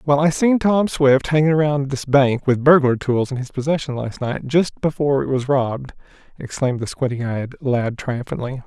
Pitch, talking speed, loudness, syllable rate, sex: 135 Hz, 195 wpm, -19 LUFS, 5.0 syllables/s, male